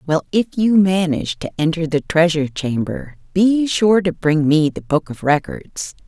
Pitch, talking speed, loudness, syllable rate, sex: 165 Hz, 180 wpm, -17 LUFS, 4.6 syllables/s, female